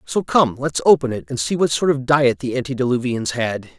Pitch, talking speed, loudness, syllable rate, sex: 135 Hz, 220 wpm, -19 LUFS, 5.4 syllables/s, male